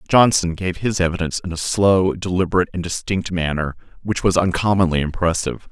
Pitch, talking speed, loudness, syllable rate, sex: 90 Hz, 155 wpm, -19 LUFS, 5.9 syllables/s, male